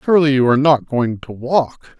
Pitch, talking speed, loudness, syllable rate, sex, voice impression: 135 Hz, 210 wpm, -16 LUFS, 5.3 syllables/s, male, masculine, slightly old, slightly powerful, slightly hard, halting, calm, mature, friendly, slightly wild, lively, kind